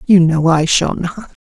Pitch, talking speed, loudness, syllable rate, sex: 175 Hz, 210 wpm, -13 LUFS, 4.1 syllables/s, female